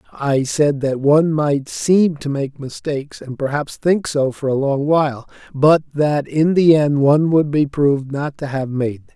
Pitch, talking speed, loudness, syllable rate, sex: 145 Hz, 205 wpm, -17 LUFS, 4.6 syllables/s, male